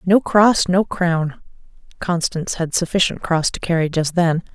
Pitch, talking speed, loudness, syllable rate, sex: 175 Hz, 160 wpm, -18 LUFS, 4.5 syllables/s, female